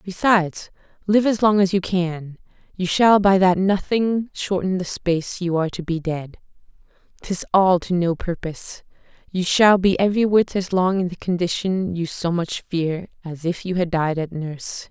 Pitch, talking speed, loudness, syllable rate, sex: 180 Hz, 185 wpm, -20 LUFS, 4.7 syllables/s, female